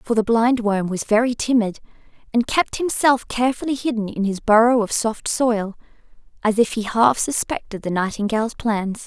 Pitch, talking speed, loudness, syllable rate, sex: 225 Hz, 165 wpm, -20 LUFS, 5.0 syllables/s, female